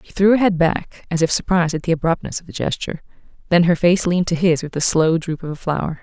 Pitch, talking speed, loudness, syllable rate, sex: 170 Hz, 270 wpm, -18 LUFS, 6.5 syllables/s, female